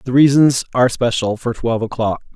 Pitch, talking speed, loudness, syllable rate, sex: 120 Hz, 180 wpm, -16 LUFS, 5.8 syllables/s, male